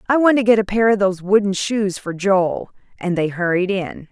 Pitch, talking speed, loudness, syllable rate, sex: 200 Hz, 235 wpm, -18 LUFS, 5.2 syllables/s, female